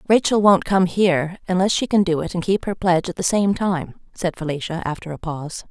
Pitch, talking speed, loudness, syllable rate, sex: 180 Hz, 230 wpm, -20 LUFS, 5.7 syllables/s, female